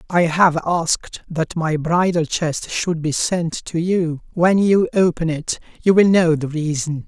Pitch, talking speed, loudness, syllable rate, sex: 165 Hz, 180 wpm, -18 LUFS, 3.9 syllables/s, male